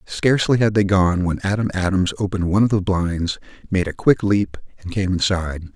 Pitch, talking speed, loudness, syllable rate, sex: 95 Hz, 200 wpm, -19 LUFS, 5.6 syllables/s, male